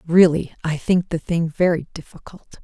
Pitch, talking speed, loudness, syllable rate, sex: 170 Hz, 160 wpm, -20 LUFS, 4.8 syllables/s, female